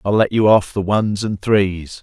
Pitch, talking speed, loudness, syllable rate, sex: 100 Hz, 235 wpm, -17 LUFS, 4.2 syllables/s, male